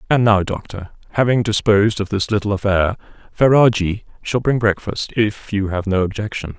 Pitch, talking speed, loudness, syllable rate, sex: 105 Hz, 165 wpm, -18 LUFS, 5.2 syllables/s, male